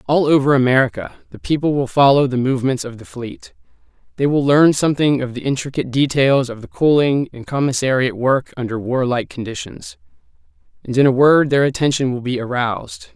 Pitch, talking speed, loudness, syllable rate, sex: 135 Hz, 175 wpm, -17 LUFS, 5.8 syllables/s, male